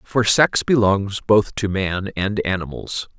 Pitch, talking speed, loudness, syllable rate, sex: 100 Hz, 150 wpm, -19 LUFS, 3.7 syllables/s, male